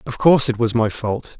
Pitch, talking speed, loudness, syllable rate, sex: 120 Hz, 260 wpm, -18 LUFS, 5.5 syllables/s, male